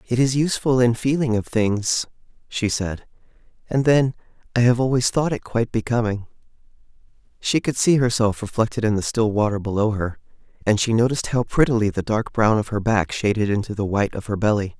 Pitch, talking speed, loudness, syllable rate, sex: 110 Hz, 190 wpm, -21 LUFS, 5.8 syllables/s, male